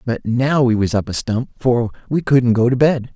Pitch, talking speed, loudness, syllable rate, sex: 120 Hz, 245 wpm, -17 LUFS, 4.6 syllables/s, male